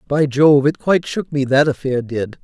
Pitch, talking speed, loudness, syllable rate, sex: 140 Hz, 220 wpm, -16 LUFS, 4.9 syllables/s, male